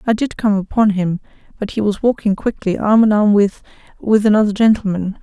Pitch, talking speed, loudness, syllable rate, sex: 205 Hz, 185 wpm, -16 LUFS, 5.6 syllables/s, female